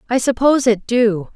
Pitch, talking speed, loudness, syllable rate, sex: 235 Hz, 175 wpm, -16 LUFS, 5.3 syllables/s, female